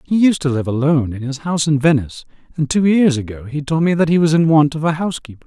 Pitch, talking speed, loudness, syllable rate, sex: 150 Hz, 275 wpm, -16 LUFS, 6.8 syllables/s, male